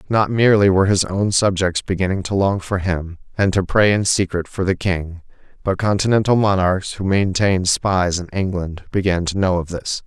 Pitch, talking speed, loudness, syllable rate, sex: 95 Hz, 190 wpm, -18 LUFS, 5.1 syllables/s, male